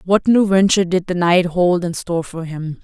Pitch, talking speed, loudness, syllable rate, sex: 180 Hz, 235 wpm, -17 LUFS, 5.2 syllables/s, female